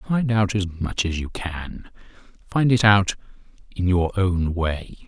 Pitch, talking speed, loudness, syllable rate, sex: 95 Hz, 165 wpm, -22 LUFS, 3.8 syllables/s, male